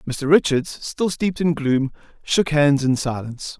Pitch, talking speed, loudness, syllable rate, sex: 145 Hz, 165 wpm, -20 LUFS, 4.5 syllables/s, male